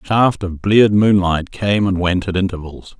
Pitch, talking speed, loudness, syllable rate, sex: 95 Hz, 200 wpm, -16 LUFS, 4.8 syllables/s, male